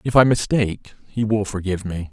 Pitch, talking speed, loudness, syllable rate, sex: 105 Hz, 200 wpm, -20 LUFS, 5.8 syllables/s, male